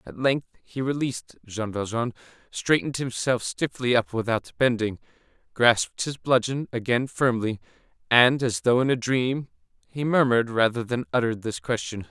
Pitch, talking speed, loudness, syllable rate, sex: 120 Hz, 150 wpm, -24 LUFS, 5.0 syllables/s, male